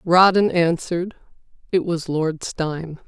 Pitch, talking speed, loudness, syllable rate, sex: 170 Hz, 115 wpm, -20 LUFS, 4.2 syllables/s, female